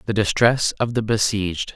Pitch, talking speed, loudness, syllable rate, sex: 110 Hz, 170 wpm, -20 LUFS, 5.2 syllables/s, male